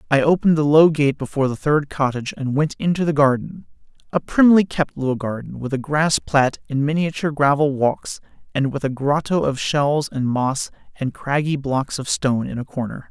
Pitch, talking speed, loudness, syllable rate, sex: 145 Hz, 190 wpm, -20 LUFS, 5.3 syllables/s, male